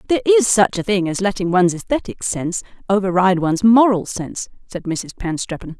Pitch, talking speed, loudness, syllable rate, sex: 195 Hz, 175 wpm, -18 LUFS, 6.2 syllables/s, female